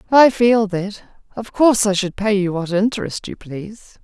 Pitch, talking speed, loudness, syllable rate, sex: 205 Hz, 195 wpm, -17 LUFS, 5.0 syllables/s, female